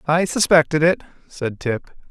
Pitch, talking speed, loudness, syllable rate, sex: 155 Hz, 145 wpm, -19 LUFS, 4.3 syllables/s, male